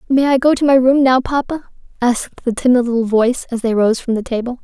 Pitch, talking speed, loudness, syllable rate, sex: 250 Hz, 245 wpm, -15 LUFS, 6.1 syllables/s, female